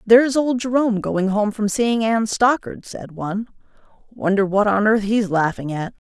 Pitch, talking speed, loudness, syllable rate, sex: 210 Hz, 180 wpm, -19 LUFS, 5.0 syllables/s, female